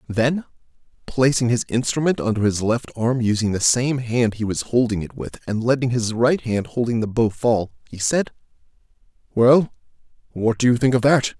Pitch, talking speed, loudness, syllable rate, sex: 120 Hz, 185 wpm, -20 LUFS, 4.9 syllables/s, male